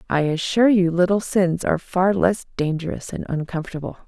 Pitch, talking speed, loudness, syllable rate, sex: 180 Hz, 160 wpm, -21 LUFS, 5.7 syllables/s, female